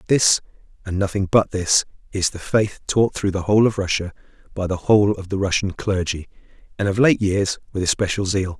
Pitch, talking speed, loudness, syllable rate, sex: 100 Hz, 195 wpm, -20 LUFS, 5.5 syllables/s, male